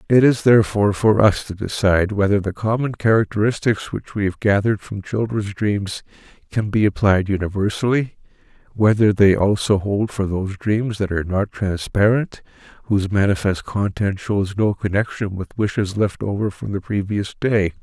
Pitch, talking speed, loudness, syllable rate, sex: 100 Hz, 160 wpm, -19 LUFS, 5.1 syllables/s, male